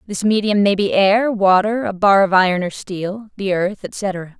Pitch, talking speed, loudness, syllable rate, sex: 200 Hz, 205 wpm, -17 LUFS, 4.3 syllables/s, female